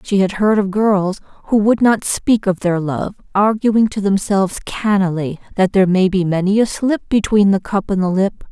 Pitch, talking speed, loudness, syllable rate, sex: 200 Hz, 205 wpm, -16 LUFS, 4.8 syllables/s, female